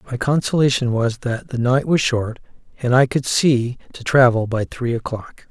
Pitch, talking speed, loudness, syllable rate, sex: 125 Hz, 185 wpm, -19 LUFS, 4.6 syllables/s, male